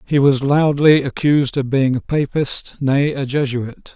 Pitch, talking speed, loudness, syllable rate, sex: 135 Hz, 165 wpm, -17 LUFS, 4.2 syllables/s, male